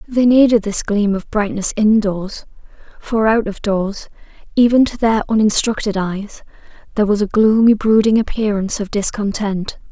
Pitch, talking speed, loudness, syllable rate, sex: 210 Hz, 150 wpm, -16 LUFS, 4.8 syllables/s, female